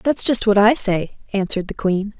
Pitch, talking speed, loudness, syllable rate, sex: 205 Hz, 220 wpm, -18 LUFS, 5.2 syllables/s, female